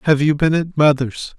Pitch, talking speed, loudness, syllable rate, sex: 150 Hz, 215 wpm, -17 LUFS, 4.9 syllables/s, male